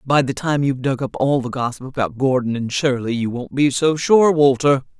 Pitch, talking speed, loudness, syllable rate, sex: 135 Hz, 230 wpm, -18 LUFS, 5.3 syllables/s, female